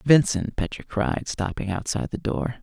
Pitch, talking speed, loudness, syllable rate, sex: 115 Hz, 160 wpm, -25 LUFS, 4.9 syllables/s, male